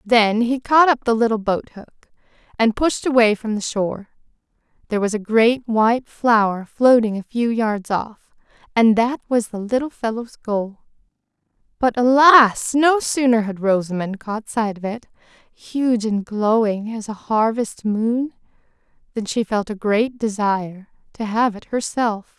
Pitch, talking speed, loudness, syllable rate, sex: 225 Hz, 160 wpm, -19 LUFS, 4.3 syllables/s, female